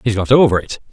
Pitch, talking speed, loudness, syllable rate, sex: 110 Hz, 260 wpm, -14 LUFS, 6.8 syllables/s, male